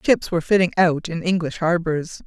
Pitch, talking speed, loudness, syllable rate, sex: 170 Hz, 185 wpm, -20 LUFS, 5.3 syllables/s, female